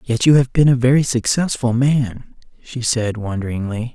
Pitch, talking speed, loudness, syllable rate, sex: 125 Hz, 165 wpm, -17 LUFS, 4.8 syllables/s, male